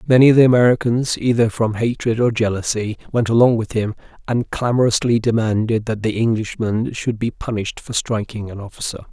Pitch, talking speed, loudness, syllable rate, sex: 115 Hz, 170 wpm, -18 LUFS, 5.6 syllables/s, male